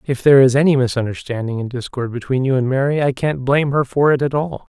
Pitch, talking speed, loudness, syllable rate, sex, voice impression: 135 Hz, 240 wpm, -17 LUFS, 6.3 syllables/s, male, masculine, adult-like, slightly thick, sincere, friendly